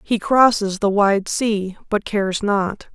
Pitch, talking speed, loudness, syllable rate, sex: 205 Hz, 165 wpm, -19 LUFS, 3.7 syllables/s, female